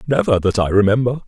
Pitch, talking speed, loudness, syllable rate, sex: 115 Hz, 190 wpm, -16 LUFS, 6.4 syllables/s, male